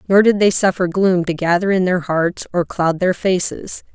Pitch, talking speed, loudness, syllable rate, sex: 180 Hz, 215 wpm, -17 LUFS, 4.7 syllables/s, female